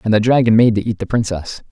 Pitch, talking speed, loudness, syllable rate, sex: 110 Hz, 280 wpm, -15 LUFS, 6.4 syllables/s, male